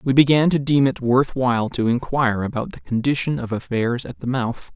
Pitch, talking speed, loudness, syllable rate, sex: 130 Hz, 215 wpm, -20 LUFS, 5.3 syllables/s, male